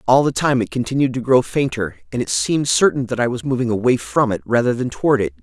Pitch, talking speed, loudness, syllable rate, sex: 125 Hz, 255 wpm, -18 LUFS, 6.2 syllables/s, male